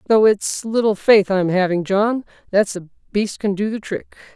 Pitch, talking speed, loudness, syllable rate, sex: 205 Hz, 195 wpm, -19 LUFS, 4.7 syllables/s, female